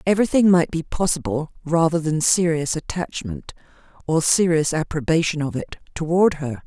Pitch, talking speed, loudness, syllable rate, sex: 160 Hz, 135 wpm, -20 LUFS, 5.0 syllables/s, female